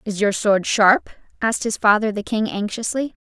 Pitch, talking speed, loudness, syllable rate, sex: 215 Hz, 185 wpm, -19 LUFS, 5.1 syllables/s, female